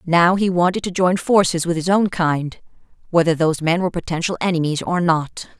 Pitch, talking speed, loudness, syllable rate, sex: 175 Hz, 195 wpm, -18 LUFS, 5.5 syllables/s, female